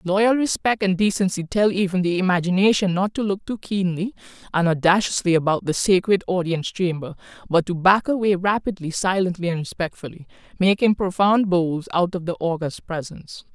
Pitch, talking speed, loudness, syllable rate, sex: 185 Hz, 160 wpm, -21 LUFS, 5.4 syllables/s, female